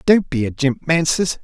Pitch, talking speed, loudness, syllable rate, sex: 155 Hz, 210 wpm, -18 LUFS, 4.6 syllables/s, male